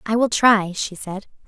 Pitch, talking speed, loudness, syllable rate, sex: 210 Hz, 205 wpm, -18 LUFS, 4.3 syllables/s, female